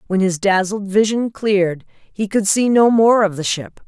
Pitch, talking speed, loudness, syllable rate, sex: 200 Hz, 200 wpm, -16 LUFS, 4.5 syllables/s, female